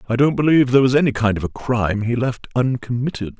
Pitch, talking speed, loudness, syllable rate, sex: 125 Hz, 230 wpm, -18 LUFS, 6.7 syllables/s, male